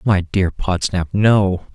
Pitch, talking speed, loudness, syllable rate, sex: 95 Hz, 140 wpm, -17 LUFS, 3.2 syllables/s, male